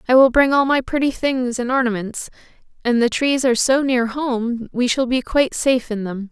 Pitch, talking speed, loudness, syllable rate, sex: 250 Hz, 220 wpm, -18 LUFS, 5.2 syllables/s, female